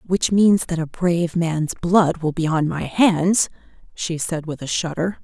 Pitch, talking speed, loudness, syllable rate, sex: 170 Hz, 195 wpm, -20 LUFS, 4.1 syllables/s, female